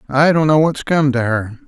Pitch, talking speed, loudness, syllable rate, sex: 140 Hz, 250 wpm, -15 LUFS, 4.9 syllables/s, male